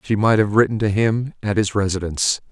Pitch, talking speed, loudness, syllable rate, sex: 105 Hz, 215 wpm, -19 LUFS, 5.7 syllables/s, male